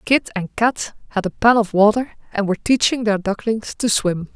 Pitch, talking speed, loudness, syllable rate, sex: 215 Hz, 205 wpm, -19 LUFS, 5.0 syllables/s, female